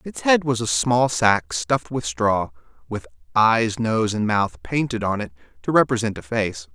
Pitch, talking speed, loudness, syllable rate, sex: 110 Hz, 185 wpm, -21 LUFS, 4.4 syllables/s, male